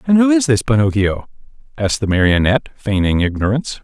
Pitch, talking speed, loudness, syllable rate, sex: 120 Hz, 155 wpm, -16 LUFS, 6.5 syllables/s, male